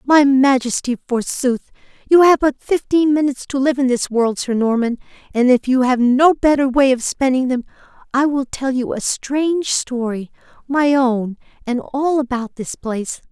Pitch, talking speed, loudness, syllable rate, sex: 260 Hz, 170 wpm, -17 LUFS, 4.7 syllables/s, female